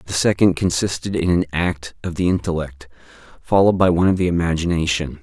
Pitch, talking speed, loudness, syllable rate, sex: 85 Hz, 170 wpm, -19 LUFS, 5.9 syllables/s, male